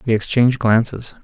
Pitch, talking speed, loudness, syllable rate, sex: 115 Hz, 145 wpm, -17 LUFS, 5.4 syllables/s, male